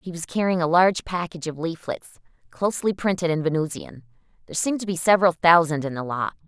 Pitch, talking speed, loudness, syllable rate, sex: 170 Hz, 195 wpm, -22 LUFS, 6.6 syllables/s, female